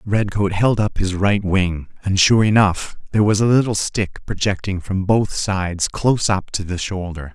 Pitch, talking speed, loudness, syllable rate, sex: 100 Hz, 190 wpm, -19 LUFS, 4.6 syllables/s, male